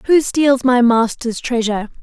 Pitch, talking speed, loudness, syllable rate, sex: 245 Hz, 150 wpm, -15 LUFS, 4.5 syllables/s, female